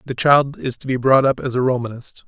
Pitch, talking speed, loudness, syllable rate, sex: 130 Hz, 265 wpm, -18 LUFS, 5.8 syllables/s, male